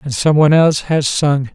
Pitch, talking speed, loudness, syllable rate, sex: 145 Hz, 235 wpm, -13 LUFS, 5.6 syllables/s, male